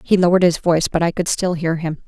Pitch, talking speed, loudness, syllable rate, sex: 170 Hz, 290 wpm, -17 LUFS, 6.6 syllables/s, female